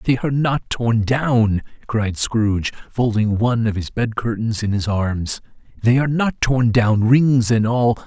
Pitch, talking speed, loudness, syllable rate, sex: 115 Hz, 180 wpm, -19 LUFS, 4.3 syllables/s, male